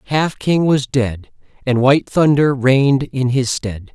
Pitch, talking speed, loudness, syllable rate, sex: 130 Hz, 180 wpm, -16 LUFS, 4.1 syllables/s, male